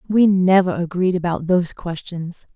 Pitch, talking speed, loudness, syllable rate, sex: 180 Hz, 140 wpm, -19 LUFS, 4.7 syllables/s, female